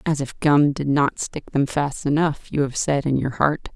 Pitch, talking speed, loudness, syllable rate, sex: 145 Hz, 240 wpm, -21 LUFS, 4.5 syllables/s, female